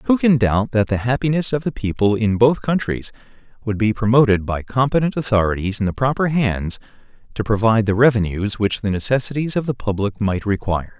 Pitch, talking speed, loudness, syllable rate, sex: 115 Hz, 185 wpm, -19 LUFS, 5.7 syllables/s, male